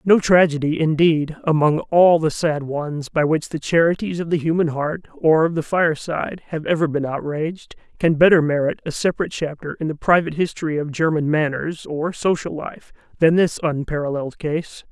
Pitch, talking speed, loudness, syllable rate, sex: 160 Hz, 175 wpm, -20 LUFS, 5.3 syllables/s, male